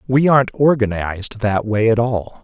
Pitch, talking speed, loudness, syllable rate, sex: 115 Hz, 175 wpm, -17 LUFS, 4.9 syllables/s, male